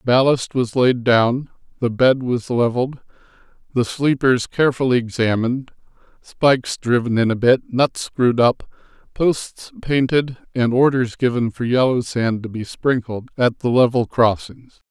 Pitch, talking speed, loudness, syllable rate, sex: 125 Hz, 140 wpm, -18 LUFS, 4.5 syllables/s, male